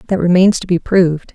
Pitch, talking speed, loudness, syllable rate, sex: 175 Hz, 225 wpm, -13 LUFS, 6.1 syllables/s, female